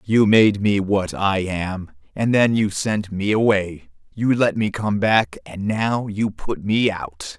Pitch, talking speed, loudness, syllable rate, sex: 100 Hz, 185 wpm, -20 LUFS, 3.6 syllables/s, male